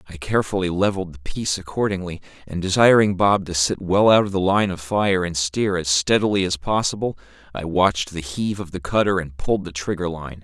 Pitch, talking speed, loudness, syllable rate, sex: 95 Hz, 205 wpm, -21 LUFS, 5.8 syllables/s, male